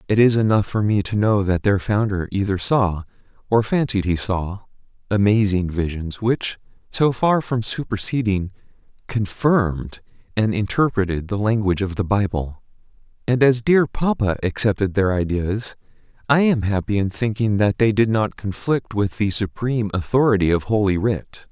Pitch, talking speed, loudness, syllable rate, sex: 105 Hz, 155 wpm, -20 LUFS, 4.8 syllables/s, male